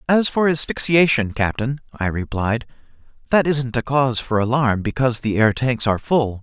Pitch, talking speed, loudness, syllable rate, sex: 125 Hz, 170 wpm, -19 LUFS, 5.1 syllables/s, male